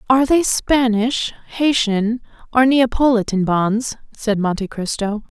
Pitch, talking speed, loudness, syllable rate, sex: 230 Hz, 110 wpm, -18 LUFS, 4.0 syllables/s, female